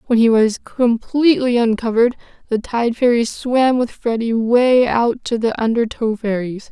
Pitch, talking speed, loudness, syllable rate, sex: 235 Hz, 150 wpm, -17 LUFS, 4.5 syllables/s, female